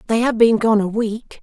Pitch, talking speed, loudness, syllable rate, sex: 220 Hz, 250 wpm, -17 LUFS, 4.8 syllables/s, female